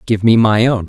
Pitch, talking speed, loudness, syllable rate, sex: 110 Hz, 275 wpm, -12 LUFS, 5.3 syllables/s, male